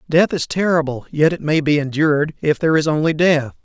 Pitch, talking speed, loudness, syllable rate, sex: 155 Hz, 200 wpm, -17 LUFS, 5.8 syllables/s, male